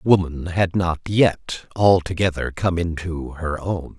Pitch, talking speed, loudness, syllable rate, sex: 85 Hz, 135 wpm, -21 LUFS, 3.7 syllables/s, male